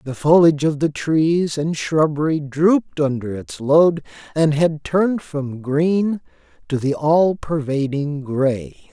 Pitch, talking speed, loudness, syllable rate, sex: 155 Hz, 140 wpm, -19 LUFS, 3.8 syllables/s, male